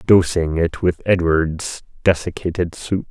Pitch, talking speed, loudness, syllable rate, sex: 85 Hz, 115 wpm, -19 LUFS, 4.0 syllables/s, male